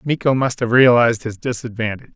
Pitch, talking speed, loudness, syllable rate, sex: 120 Hz, 165 wpm, -17 LUFS, 6.4 syllables/s, male